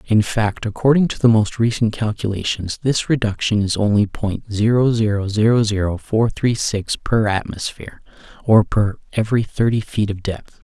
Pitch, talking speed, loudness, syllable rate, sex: 110 Hz, 165 wpm, -18 LUFS, 4.8 syllables/s, male